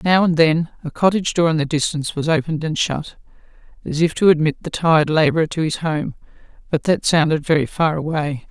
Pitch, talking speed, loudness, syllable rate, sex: 160 Hz, 205 wpm, -18 LUFS, 5.9 syllables/s, female